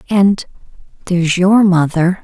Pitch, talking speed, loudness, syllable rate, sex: 185 Hz, 80 wpm, -13 LUFS, 4.2 syllables/s, female